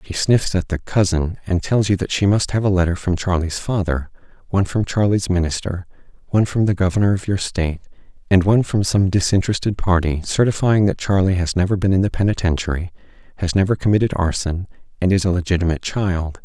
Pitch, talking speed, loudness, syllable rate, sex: 95 Hz, 190 wpm, -19 LUFS, 6.1 syllables/s, male